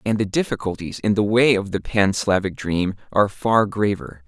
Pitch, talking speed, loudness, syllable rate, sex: 100 Hz, 195 wpm, -20 LUFS, 5.0 syllables/s, male